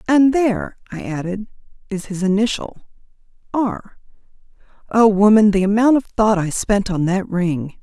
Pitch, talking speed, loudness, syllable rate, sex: 205 Hz, 145 wpm, -17 LUFS, 4.6 syllables/s, female